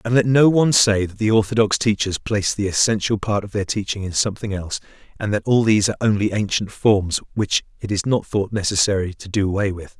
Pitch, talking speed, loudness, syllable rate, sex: 105 Hz, 220 wpm, -19 LUFS, 6.1 syllables/s, male